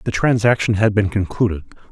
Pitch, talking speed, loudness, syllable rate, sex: 105 Hz, 155 wpm, -18 LUFS, 5.5 syllables/s, male